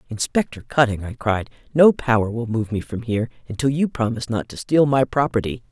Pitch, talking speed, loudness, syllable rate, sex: 120 Hz, 200 wpm, -21 LUFS, 5.8 syllables/s, female